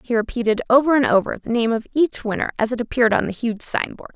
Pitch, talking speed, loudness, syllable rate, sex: 235 Hz, 245 wpm, -20 LUFS, 6.7 syllables/s, female